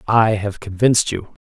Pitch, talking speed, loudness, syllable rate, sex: 105 Hz, 165 wpm, -18 LUFS, 5.2 syllables/s, male